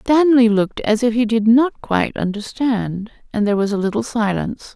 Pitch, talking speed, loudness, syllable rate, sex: 225 Hz, 190 wpm, -18 LUFS, 5.4 syllables/s, female